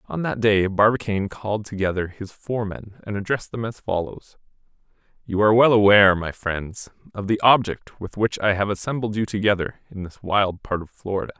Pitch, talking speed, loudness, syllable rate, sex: 100 Hz, 185 wpm, -21 LUFS, 5.7 syllables/s, male